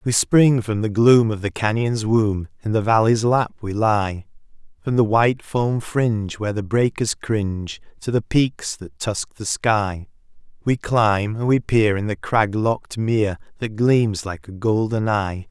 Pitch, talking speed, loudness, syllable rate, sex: 110 Hz, 180 wpm, -20 LUFS, 4.2 syllables/s, male